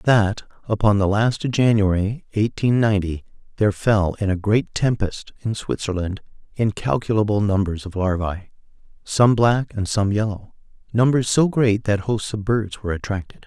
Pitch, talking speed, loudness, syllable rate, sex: 105 Hz, 150 wpm, -21 LUFS, 5.0 syllables/s, male